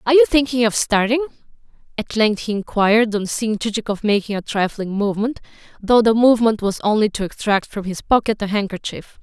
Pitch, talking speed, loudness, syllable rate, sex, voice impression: 220 Hz, 180 wpm, -18 LUFS, 5.8 syllables/s, female, feminine, slightly young, fluent, slightly cute, slightly friendly, lively